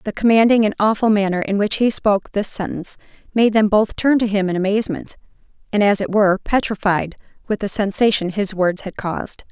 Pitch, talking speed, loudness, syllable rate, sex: 205 Hz, 195 wpm, -18 LUFS, 5.9 syllables/s, female